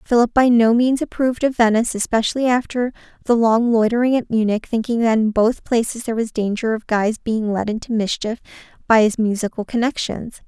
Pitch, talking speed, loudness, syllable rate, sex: 230 Hz, 185 wpm, -18 LUFS, 5.7 syllables/s, female